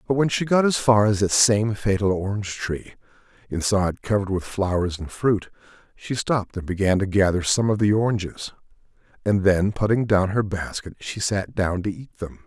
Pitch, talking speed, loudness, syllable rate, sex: 100 Hz, 195 wpm, -22 LUFS, 5.2 syllables/s, male